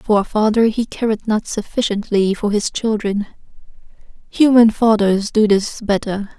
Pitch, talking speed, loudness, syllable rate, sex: 215 Hz, 140 wpm, -17 LUFS, 4.5 syllables/s, female